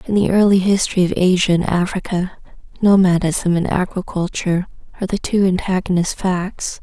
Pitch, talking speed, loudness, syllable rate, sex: 185 Hz, 140 wpm, -17 LUFS, 5.3 syllables/s, female